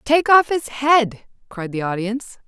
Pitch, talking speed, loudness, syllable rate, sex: 245 Hz, 170 wpm, -18 LUFS, 4.3 syllables/s, female